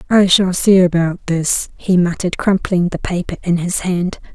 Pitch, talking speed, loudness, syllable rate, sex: 180 Hz, 180 wpm, -16 LUFS, 4.6 syllables/s, female